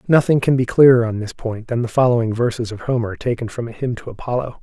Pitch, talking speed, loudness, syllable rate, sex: 120 Hz, 245 wpm, -18 LUFS, 6.4 syllables/s, male